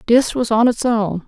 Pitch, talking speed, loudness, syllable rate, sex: 230 Hz, 235 wpm, -17 LUFS, 4.4 syllables/s, female